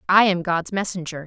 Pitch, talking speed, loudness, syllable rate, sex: 180 Hz, 190 wpm, -21 LUFS, 5.4 syllables/s, female